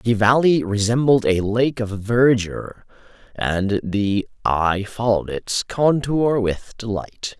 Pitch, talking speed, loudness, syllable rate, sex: 110 Hz, 120 wpm, -20 LUFS, 3.7 syllables/s, male